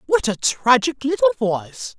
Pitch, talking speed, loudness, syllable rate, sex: 270 Hz, 150 wpm, -19 LUFS, 4.7 syllables/s, female